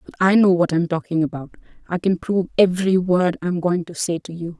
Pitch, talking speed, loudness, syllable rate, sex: 175 Hz, 220 wpm, -20 LUFS, 5.9 syllables/s, female